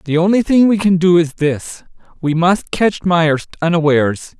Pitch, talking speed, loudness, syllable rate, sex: 170 Hz, 165 wpm, -14 LUFS, 4.4 syllables/s, male